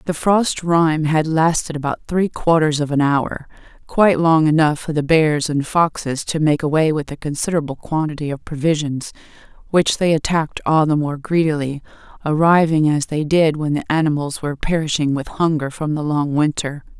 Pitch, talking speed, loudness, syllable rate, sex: 155 Hz, 175 wpm, -18 LUFS, 5.1 syllables/s, female